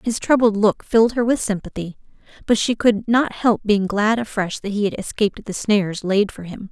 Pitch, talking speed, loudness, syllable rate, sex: 210 Hz, 215 wpm, -19 LUFS, 5.3 syllables/s, female